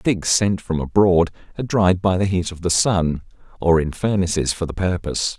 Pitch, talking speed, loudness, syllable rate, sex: 90 Hz, 210 wpm, -19 LUFS, 5.3 syllables/s, male